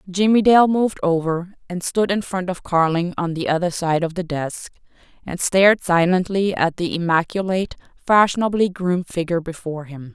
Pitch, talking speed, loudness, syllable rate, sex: 180 Hz, 160 wpm, -19 LUFS, 5.3 syllables/s, female